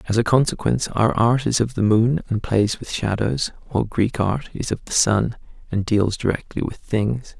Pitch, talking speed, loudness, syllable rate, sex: 110 Hz, 205 wpm, -21 LUFS, 4.9 syllables/s, male